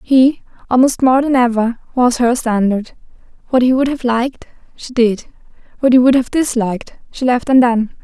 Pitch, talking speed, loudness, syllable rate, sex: 245 Hz, 170 wpm, -14 LUFS, 5.3 syllables/s, female